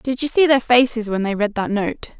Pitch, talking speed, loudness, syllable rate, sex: 235 Hz, 275 wpm, -18 LUFS, 5.1 syllables/s, female